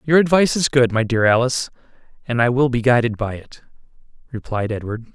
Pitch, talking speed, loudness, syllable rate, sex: 125 Hz, 185 wpm, -18 LUFS, 6.1 syllables/s, male